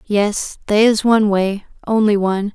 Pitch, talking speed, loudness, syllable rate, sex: 205 Hz, 140 wpm, -16 LUFS, 4.7 syllables/s, female